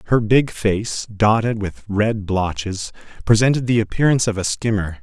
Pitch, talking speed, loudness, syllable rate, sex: 105 Hz, 155 wpm, -19 LUFS, 4.8 syllables/s, male